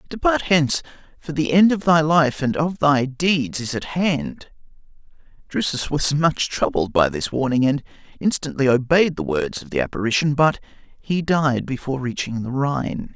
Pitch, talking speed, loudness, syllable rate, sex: 150 Hz, 170 wpm, -20 LUFS, 4.8 syllables/s, male